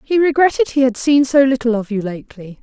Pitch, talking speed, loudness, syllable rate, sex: 255 Hz, 230 wpm, -15 LUFS, 6.0 syllables/s, female